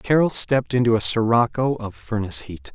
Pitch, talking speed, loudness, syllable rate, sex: 115 Hz, 175 wpm, -20 LUFS, 5.5 syllables/s, male